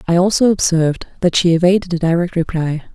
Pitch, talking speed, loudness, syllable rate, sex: 175 Hz, 185 wpm, -15 LUFS, 6.3 syllables/s, female